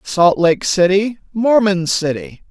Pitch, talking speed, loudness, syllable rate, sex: 195 Hz, 120 wpm, -15 LUFS, 3.6 syllables/s, male